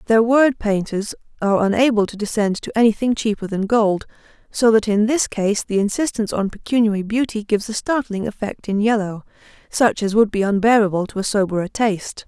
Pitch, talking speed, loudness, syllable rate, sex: 215 Hz, 175 wpm, -19 LUFS, 5.7 syllables/s, female